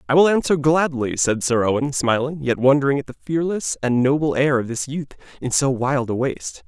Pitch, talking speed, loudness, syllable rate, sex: 140 Hz, 215 wpm, -20 LUFS, 5.5 syllables/s, male